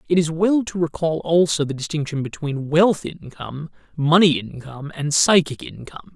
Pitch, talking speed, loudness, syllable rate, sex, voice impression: 160 Hz, 155 wpm, -20 LUFS, 5.1 syllables/s, male, masculine, slightly adult-like, tensed, slightly powerful, fluent, refreshing, slightly unique, lively